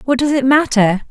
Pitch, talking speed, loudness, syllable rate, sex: 255 Hz, 215 wpm, -14 LUFS, 5.4 syllables/s, female